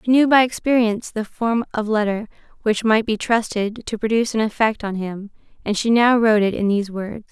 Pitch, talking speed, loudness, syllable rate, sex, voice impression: 220 Hz, 215 wpm, -19 LUFS, 5.6 syllables/s, female, feminine, slightly young, tensed, slightly bright, soft, clear, cute, calm, friendly, reassuring, lively, slightly light